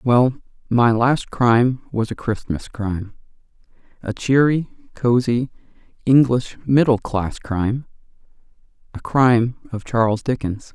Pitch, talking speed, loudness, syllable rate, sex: 120 Hz, 110 wpm, -19 LUFS, 4.3 syllables/s, male